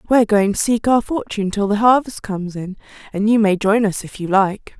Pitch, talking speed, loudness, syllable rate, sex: 210 Hz, 240 wpm, -17 LUFS, 5.7 syllables/s, female